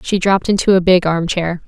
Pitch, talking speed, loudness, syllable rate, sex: 180 Hz, 250 wpm, -14 LUFS, 5.8 syllables/s, female